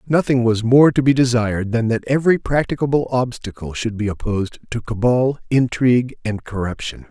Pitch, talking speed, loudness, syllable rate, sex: 120 Hz, 160 wpm, -18 LUFS, 5.4 syllables/s, male